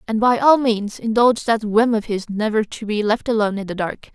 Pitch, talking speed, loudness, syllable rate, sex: 220 Hz, 245 wpm, -19 LUFS, 5.6 syllables/s, female